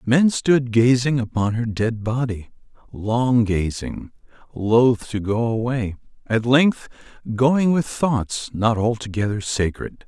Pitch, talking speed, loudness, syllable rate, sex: 115 Hz, 105 wpm, -20 LUFS, 3.6 syllables/s, male